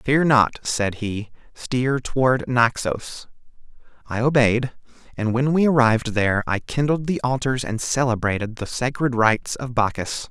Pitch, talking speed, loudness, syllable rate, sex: 120 Hz, 145 wpm, -21 LUFS, 4.5 syllables/s, male